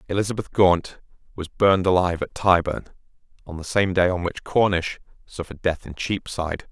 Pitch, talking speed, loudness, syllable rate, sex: 90 Hz, 160 wpm, -22 LUFS, 5.5 syllables/s, male